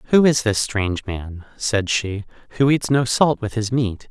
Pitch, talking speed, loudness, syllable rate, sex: 115 Hz, 205 wpm, -20 LUFS, 4.4 syllables/s, male